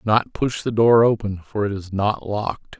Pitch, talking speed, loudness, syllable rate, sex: 105 Hz, 235 wpm, -20 LUFS, 4.9 syllables/s, male